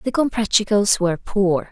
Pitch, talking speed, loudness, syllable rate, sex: 205 Hz, 140 wpm, -19 LUFS, 5.0 syllables/s, female